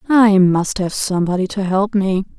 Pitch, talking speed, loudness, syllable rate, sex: 195 Hz, 175 wpm, -16 LUFS, 4.8 syllables/s, female